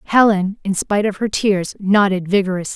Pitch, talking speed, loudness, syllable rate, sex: 195 Hz, 175 wpm, -17 LUFS, 5.6 syllables/s, female